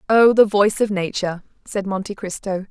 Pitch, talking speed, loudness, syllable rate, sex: 200 Hz, 180 wpm, -19 LUFS, 5.7 syllables/s, female